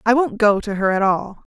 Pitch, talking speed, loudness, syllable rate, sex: 210 Hz, 270 wpm, -18 LUFS, 5.2 syllables/s, female